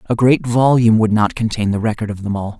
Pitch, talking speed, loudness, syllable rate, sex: 110 Hz, 255 wpm, -16 LUFS, 6.0 syllables/s, male